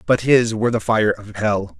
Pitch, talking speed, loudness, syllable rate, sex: 105 Hz, 235 wpm, -18 LUFS, 5.0 syllables/s, male